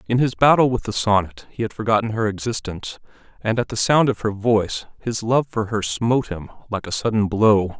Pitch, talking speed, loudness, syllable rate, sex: 110 Hz, 215 wpm, -20 LUFS, 5.6 syllables/s, male